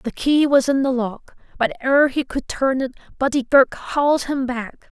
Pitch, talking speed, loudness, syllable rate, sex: 265 Hz, 205 wpm, -19 LUFS, 4.5 syllables/s, female